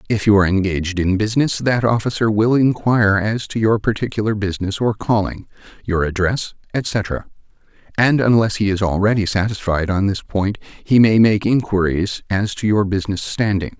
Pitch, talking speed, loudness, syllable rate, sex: 105 Hz, 165 wpm, -18 LUFS, 5.3 syllables/s, male